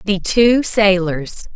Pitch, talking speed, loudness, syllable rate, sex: 200 Hz, 115 wpm, -15 LUFS, 3.0 syllables/s, female